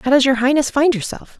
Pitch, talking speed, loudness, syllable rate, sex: 270 Hz, 260 wpm, -16 LUFS, 5.9 syllables/s, female